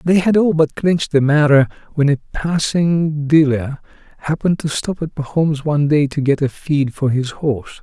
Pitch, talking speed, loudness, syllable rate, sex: 150 Hz, 190 wpm, -17 LUFS, 4.9 syllables/s, male